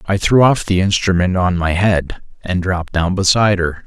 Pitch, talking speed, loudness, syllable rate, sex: 95 Hz, 200 wpm, -15 LUFS, 5.2 syllables/s, male